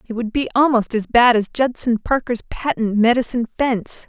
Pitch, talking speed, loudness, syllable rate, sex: 235 Hz, 175 wpm, -18 LUFS, 5.2 syllables/s, female